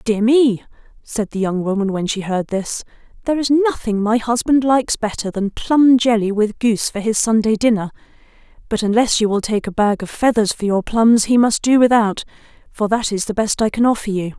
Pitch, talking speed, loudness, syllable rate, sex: 220 Hz, 215 wpm, -17 LUFS, 5.3 syllables/s, female